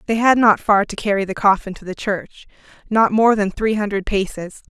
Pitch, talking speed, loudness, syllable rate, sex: 205 Hz, 215 wpm, -18 LUFS, 5.2 syllables/s, female